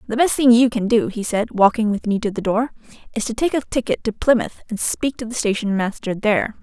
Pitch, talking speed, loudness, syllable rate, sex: 225 Hz, 255 wpm, -19 LUFS, 5.7 syllables/s, female